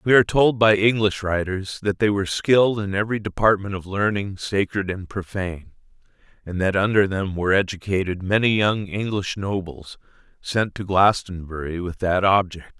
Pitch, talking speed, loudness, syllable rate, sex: 100 Hz, 160 wpm, -21 LUFS, 5.1 syllables/s, male